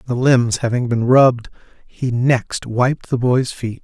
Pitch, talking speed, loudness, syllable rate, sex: 125 Hz, 170 wpm, -17 LUFS, 4.0 syllables/s, male